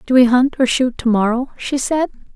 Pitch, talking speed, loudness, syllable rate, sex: 250 Hz, 230 wpm, -16 LUFS, 5.1 syllables/s, female